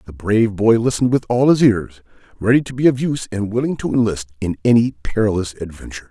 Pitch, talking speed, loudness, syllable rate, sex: 110 Hz, 205 wpm, -17 LUFS, 6.3 syllables/s, male